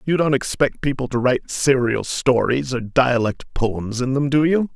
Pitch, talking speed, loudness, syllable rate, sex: 130 Hz, 190 wpm, -20 LUFS, 4.6 syllables/s, male